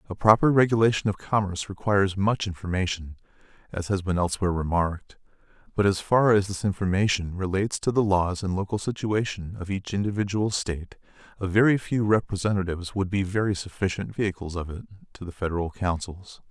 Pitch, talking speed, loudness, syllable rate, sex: 95 Hz, 165 wpm, -25 LUFS, 6.1 syllables/s, male